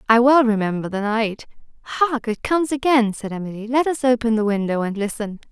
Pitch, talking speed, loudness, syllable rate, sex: 230 Hz, 195 wpm, -20 LUFS, 5.9 syllables/s, female